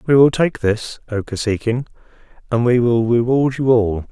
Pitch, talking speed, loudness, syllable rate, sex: 120 Hz, 175 wpm, -17 LUFS, 4.6 syllables/s, male